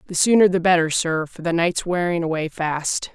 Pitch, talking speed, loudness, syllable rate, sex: 170 Hz, 210 wpm, -20 LUFS, 5.1 syllables/s, female